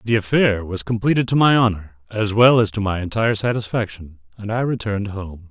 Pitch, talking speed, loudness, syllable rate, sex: 105 Hz, 195 wpm, -19 LUFS, 5.7 syllables/s, male